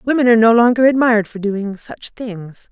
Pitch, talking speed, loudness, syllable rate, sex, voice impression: 225 Hz, 200 wpm, -14 LUFS, 5.2 syllables/s, female, very feminine, slightly young, slightly adult-like, very thin, tensed, slightly powerful, bright, hard, very clear, very fluent, cool, intellectual, very refreshing, sincere, very calm, friendly, reassuring, very unique, elegant, slightly wild, sweet, very lively, strict, slightly intense, sharp, slightly light